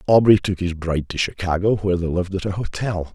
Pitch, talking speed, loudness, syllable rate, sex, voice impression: 95 Hz, 230 wpm, -21 LUFS, 6.4 syllables/s, male, very masculine, very adult-like, slightly old, very thick, slightly tensed, very powerful, slightly bright, slightly hard, muffled, fluent, slightly raspy, very cool, intellectual, slightly sincere, very calm, very mature, very friendly, very reassuring, very unique, slightly elegant, very wild, sweet, slightly lively, kind